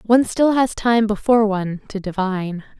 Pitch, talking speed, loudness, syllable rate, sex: 215 Hz, 170 wpm, -19 LUFS, 5.4 syllables/s, female